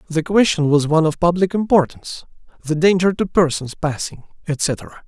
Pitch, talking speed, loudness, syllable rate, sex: 165 Hz, 155 wpm, -18 LUFS, 5.2 syllables/s, male